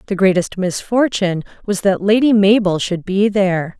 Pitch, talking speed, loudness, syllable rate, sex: 195 Hz, 160 wpm, -16 LUFS, 5.0 syllables/s, female